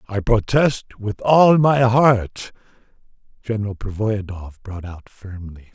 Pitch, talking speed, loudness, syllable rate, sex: 110 Hz, 115 wpm, -18 LUFS, 3.8 syllables/s, male